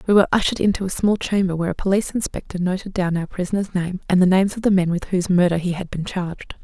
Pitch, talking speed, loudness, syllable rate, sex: 185 Hz, 260 wpm, -20 LUFS, 7.3 syllables/s, female